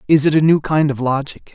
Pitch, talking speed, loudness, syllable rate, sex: 145 Hz, 270 wpm, -16 LUFS, 5.8 syllables/s, male